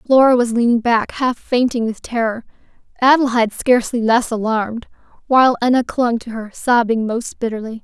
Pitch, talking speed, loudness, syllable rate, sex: 235 Hz, 155 wpm, -17 LUFS, 5.4 syllables/s, female